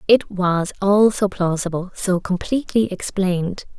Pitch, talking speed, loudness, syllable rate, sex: 190 Hz, 110 wpm, -20 LUFS, 4.4 syllables/s, female